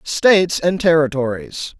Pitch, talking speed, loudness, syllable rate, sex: 160 Hz, 100 wpm, -16 LUFS, 4.2 syllables/s, male